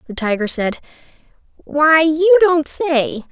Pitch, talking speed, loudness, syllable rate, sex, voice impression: 295 Hz, 125 wpm, -15 LUFS, 3.5 syllables/s, female, gender-neutral, young, tensed, slightly powerful, slightly bright, clear, slightly halting, cute, friendly, slightly sweet, lively